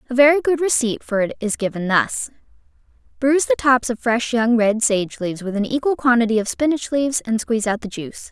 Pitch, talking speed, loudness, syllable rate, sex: 240 Hz, 215 wpm, -19 LUFS, 6.0 syllables/s, female